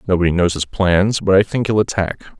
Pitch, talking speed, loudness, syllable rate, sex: 95 Hz, 225 wpm, -16 LUFS, 5.7 syllables/s, male